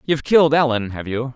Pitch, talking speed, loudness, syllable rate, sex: 135 Hz, 220 wpm, -18 LUFS, 6.7 syllables/s, male